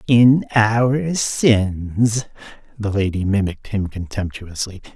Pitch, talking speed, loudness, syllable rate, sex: 105 Hz, 95 wpm, -19 LUFS, 3.4 syllables/s, male